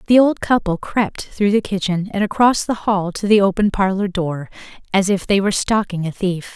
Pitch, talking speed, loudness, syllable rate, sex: 195 Hz, 210 wpm, -18 LUFS, 5.1 syllables/s, female